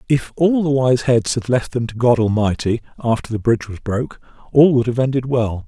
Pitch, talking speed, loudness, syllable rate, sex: 120 Hz, 220 wpm, -18 LUFS, 5.5 syllables/s, male